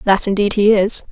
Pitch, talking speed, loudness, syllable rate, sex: 200 Hz, 215 wpm, -14 LUFS, 5.3 syllables/s, female